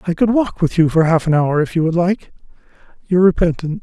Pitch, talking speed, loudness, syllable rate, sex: 170 Hz, 220 wpm, -16 LUFS, 5.9 syllables/s, male